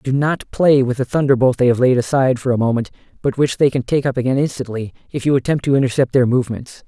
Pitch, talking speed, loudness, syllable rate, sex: 130 Hz, 245 wpm, -17 LUFS, 6.5 syllables/s, male